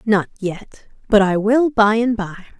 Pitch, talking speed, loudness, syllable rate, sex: 210 Hz, 185 wpm, -17 LUFS, 4.1 syllables/s, female